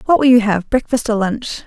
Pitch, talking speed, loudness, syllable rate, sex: 230 Hz, 215 wpm, -15 LUFS, 5.4 syllables/s, female